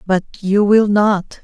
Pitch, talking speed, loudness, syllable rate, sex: 200 Hz, 165 wpm, -15 LUFS, 3.5 syllables/s, female